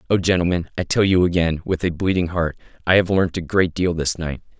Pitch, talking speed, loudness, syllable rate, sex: 85 Hz, 235 wpm, -20 LUFS, 5.7 syllables/s, male